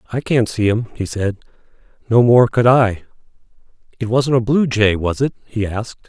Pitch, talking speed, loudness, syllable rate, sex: 115 Hz, 190 wpm, -17 LUFS, 5.1 syllables/s, male